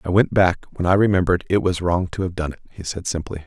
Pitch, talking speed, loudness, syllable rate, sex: 90 Hz, 275 wpm, -20 LUFS, 6.5 syllables/s, male